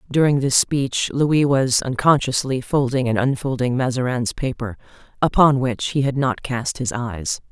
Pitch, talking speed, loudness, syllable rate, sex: 130 Hz, 150 wpm, -20 LUFS, 4.4 syllables/s, female